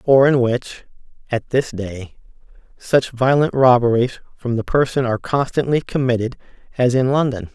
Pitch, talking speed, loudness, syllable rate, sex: 125 Hz, 145 wpm, -18 LUFS, 4.7 syllables/s, male